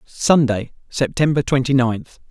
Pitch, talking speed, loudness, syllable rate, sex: 130 Hz, 105 wpm, -18 LUFS, 4.1 syllables/s, male